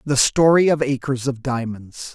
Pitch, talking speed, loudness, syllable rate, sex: 135 Hz, 170 wpm, -18 LUFS, 4.4 syllables/s, male